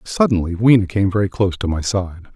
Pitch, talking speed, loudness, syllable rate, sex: 95 Hz, 205 wpm, -17 LUFS, 6.0 syllables/s, male